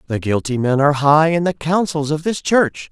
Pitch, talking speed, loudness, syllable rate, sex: 150 Hz, 225 wpm, -17 LUFS, 5.1 syllables/s, male